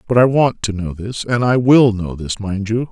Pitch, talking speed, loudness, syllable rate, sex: 110 Hz, 270 wpm, -16 LUFS, 4.8 syllables/s, male